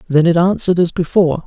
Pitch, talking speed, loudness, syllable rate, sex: 170 Hz, 205 wpm, -14 LUFS, 7.0 syllables/s, male